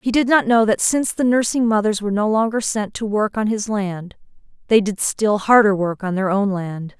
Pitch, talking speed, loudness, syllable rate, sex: 210 Hz, 230 wpm, -18 LUFS, 5.2 syllables/s, female